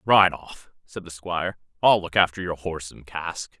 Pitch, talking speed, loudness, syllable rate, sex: 85 Hz, 200 wpm, -24 LUFS, 4.8 syllables/s, male